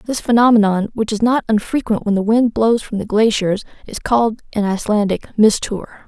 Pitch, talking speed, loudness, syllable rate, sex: 220 Hz, 180 wpm, -16 LUFS, 5.5 syllables/s, female